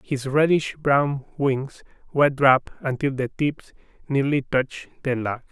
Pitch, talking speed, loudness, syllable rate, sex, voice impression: 135 Hz, 140 wpm, -22 LUFS, 4.4 syllables/s, male, masculine, adult-like, slightly tensed, slightly weak, clear, calm, friendly, slightly reassuring, unique, slightly lively, kind, slightly modest